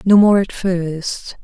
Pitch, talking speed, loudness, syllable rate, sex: 185 Hz, 170 wpm, -16 LUFS, 3.1 syllables/s, female